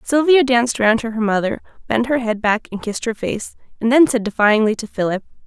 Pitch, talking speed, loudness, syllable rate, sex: 230 Hz, 220 wpm, -18 LUFS, 5.9 syllables/s, female